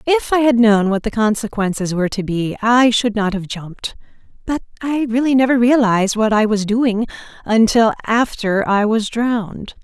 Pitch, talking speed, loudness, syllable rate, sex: 225 Hz, 175 wpm, -16 LUFS, 4.9 syllables/s, female